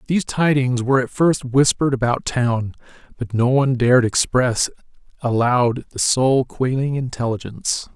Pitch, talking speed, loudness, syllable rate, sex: 125 Hz, 135 wpm, -19 LUFS, 4.9 syllables/s, male